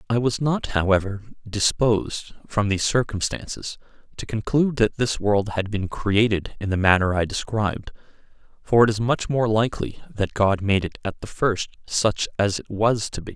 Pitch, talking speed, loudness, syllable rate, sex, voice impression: 110 Hz, 180 wpm, -23 LUFS, 4.9 syllables/s, male, masculine, adult-like, cool, intellectual